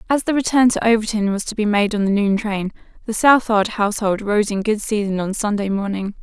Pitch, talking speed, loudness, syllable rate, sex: 210 Hz, 220 wpm, -18 LUFS, 5.7 syllables/s, female